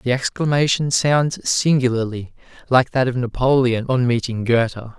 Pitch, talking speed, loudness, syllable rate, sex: 125 Hz, 130 wpm, -18 LUFS, 4.6 syllables/s, male